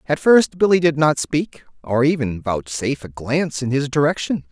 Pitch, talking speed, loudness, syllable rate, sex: 140 Hz, 185 wpm, -19 LUFS, 5.0 syllables/s, male